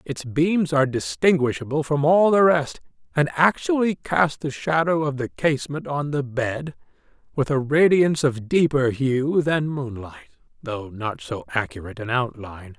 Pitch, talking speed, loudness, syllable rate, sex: 140 Hz, 155 wpm, -22 LUFS, 4.8 syllables/s, male